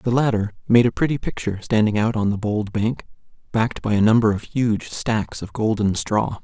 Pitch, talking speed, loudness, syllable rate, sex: 110 Hz, 205 wpm, -21 LUFS, 5.2 syllables/s, male